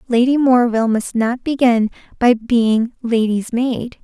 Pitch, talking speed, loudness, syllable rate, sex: 240 Hz, 135 wpm, -16 LUFS, 4.1 syllables/s, female